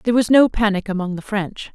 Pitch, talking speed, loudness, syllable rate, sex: 210 Hz, 240 wpm, -18 LUFS, 5.9 syllables/s, female